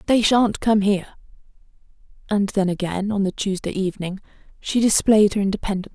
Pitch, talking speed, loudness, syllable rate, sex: 200 Hz, 150 wpm, -20 LUFS, 5.9 syllables/s, female